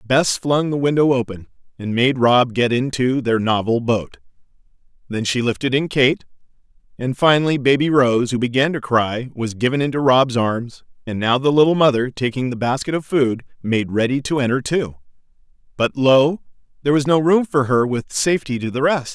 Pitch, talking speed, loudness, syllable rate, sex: 130 Hz, 185 wpm, -18 LUFS, 5.1 syllables/s, male